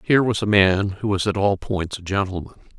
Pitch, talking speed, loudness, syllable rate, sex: 100 Hz, 235 wpm, -21 LUFS, 5.7 syllables/s, male